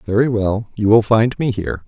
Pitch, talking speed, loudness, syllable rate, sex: 110 Hz, 225 wpm, -17 LUFS, 5.3 syllables/s, male